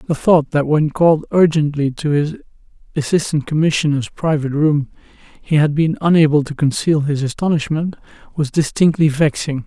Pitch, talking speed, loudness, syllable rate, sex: 150 Hz, 145 wpm, -16 LUFS, 5.2 syllables/s, male